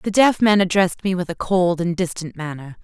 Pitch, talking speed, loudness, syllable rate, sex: 180 Hz, 235 wpm, -19 LUFS, 5.5 syllables/s, female